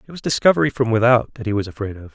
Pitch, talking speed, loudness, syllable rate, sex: 120 Hz, 280 wpm, -19 LUFS, 7.1 syllables/s, male